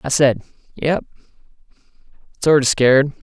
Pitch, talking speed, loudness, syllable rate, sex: 135 Hz, 110 wpm, -17 LUFS, 5.2 syllables/s, male